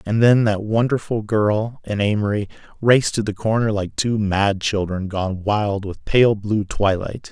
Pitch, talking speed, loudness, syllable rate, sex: 105 Hz, 170 wpm, -20 LUFS, 4.2 syllables/s, male